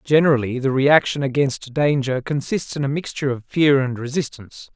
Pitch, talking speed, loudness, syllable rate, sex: 140 Hz, 165 wpm, -20 LUFS, 5.5 syllables/s, male